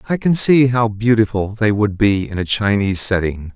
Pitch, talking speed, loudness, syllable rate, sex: 110 Hz, 200 wpm, -16 LUFS, 5.0 syllables/s, male